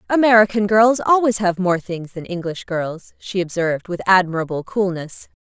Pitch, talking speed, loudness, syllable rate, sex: 190 Hz, 155 wpm, -18 LUFS, 5.0 syllables/s, female